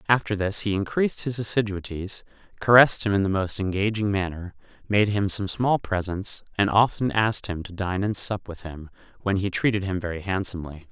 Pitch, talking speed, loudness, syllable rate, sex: 100 Hz, 185 wpm, -24 LUFS, 5.7 syllables/s, male